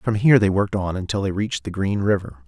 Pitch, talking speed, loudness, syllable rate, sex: 100 Hz, 265 wpm, -21 LUFS, 6.7 syllables/s, male